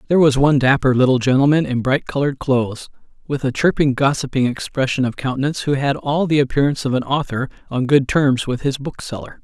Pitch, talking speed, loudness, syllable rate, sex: 135 Hz, 195 wpm, -18 LUFS, 6.2 syllables/s, male